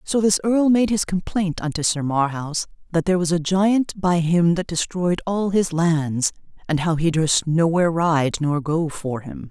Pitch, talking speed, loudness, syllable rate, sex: 170 Hz, 195 wpm, -20 LUFS, 4.4 syllables/s, female